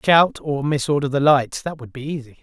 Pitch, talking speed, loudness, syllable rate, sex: 140 Hz, 245 wpm, -20 LUFS, 5.2 syllables/s, male